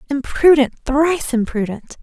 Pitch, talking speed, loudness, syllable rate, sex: 275 Hz, 90 wpm, -17 LUFS, 4.7 syllables/s, female